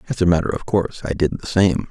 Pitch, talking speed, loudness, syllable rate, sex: 90 Hz, 285 wpm, -20 LUFS, 6.6 syllables/s, male